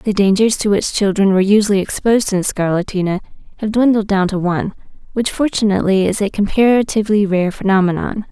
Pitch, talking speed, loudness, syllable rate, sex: 205 Hz, 160 wpm, -15 LUFS, 6.2 syllables/s, female